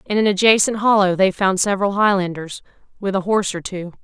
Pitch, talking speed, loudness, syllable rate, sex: 195 Hz, 195 wpm, -18 LUFS, 6.1 syllables/s, female